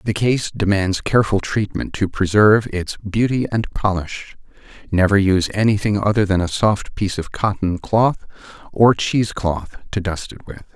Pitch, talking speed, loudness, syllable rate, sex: 100 Hz, 160 wpm, -18 LUFS, 4.9 syllables/s, male